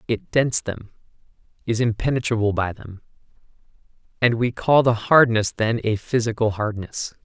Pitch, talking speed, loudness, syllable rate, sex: 115 Hz, 135 wpm, -21 LUFS, 4.7 syllables/s, male